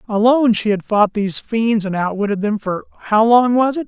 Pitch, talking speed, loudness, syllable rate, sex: 215 Hz, 200 wpm, -16 LUFS, 5.4 syllables/s, male